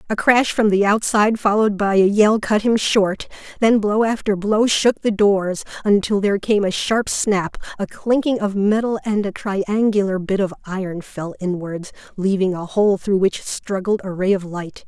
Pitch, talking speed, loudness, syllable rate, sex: 200 Hz, 190 wpm, -19 LUFS, 4.6 syllables/s, female